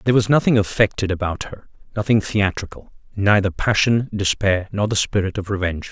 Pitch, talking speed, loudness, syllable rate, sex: 100 Hz, 160 wpm, -19 LUFS, 5.7 syllables/s, male